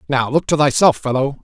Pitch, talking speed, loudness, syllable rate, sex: 135 Hz, 210 wpm, -16 LUFS, 5.8 syllables/s, male